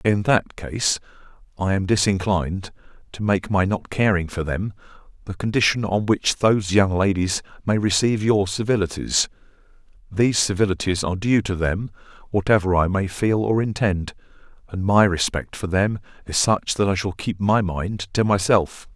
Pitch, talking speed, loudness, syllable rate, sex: 100 Hz, 160 wpm, -21 LUFS, 4.9 syllables/s, male